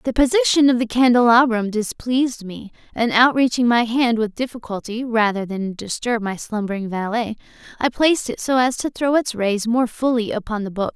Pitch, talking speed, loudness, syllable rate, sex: 235 Hz, 180 wpm, -19 LUFS, 5.2 syllables/s, female